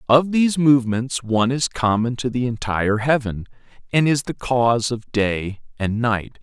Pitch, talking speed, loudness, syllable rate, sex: 120 Hz, 170 wpm, -20 LUFS, 4.8 syllables/s, male